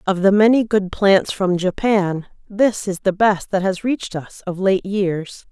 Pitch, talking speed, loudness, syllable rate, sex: 195 Hz, 195 wpm, -18 LUFS, 4.1 syllables/s, female